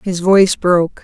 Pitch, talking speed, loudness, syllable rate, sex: 180 Hz, 175 wpm, -13 LUFS, 5.4 syllables/s, female